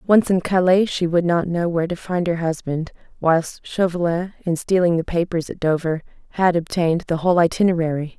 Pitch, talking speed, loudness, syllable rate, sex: 170 Hz, 185 wpm, -20 LUFS, 5.5 syllables/s, female